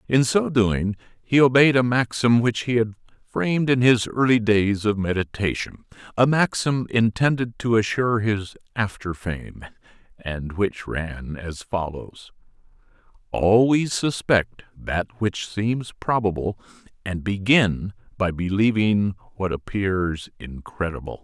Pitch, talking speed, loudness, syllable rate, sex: 105 Hz, 120 wpm, -22 LUFS, 4.0 syllables/s, male